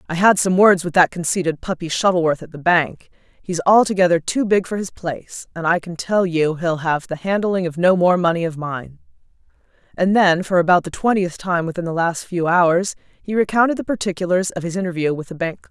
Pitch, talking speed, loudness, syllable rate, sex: 175 Hz, 220 wpm, -18 LUFS, 5.5 syllables/s, female